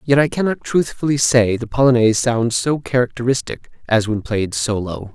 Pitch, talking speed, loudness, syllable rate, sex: 120 Hz, 165 wpm, -18 LUFS, 5.1 syllables/s, male